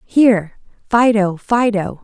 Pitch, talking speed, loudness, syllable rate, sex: 210 Hz, 90 wpm, -15 LUFS, 3.6 syllables/s, female